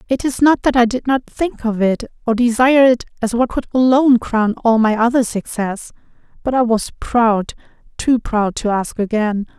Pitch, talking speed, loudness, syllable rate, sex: 235 Hz, 195 wpm, -16 LUFS, 4.8 syllables/s, female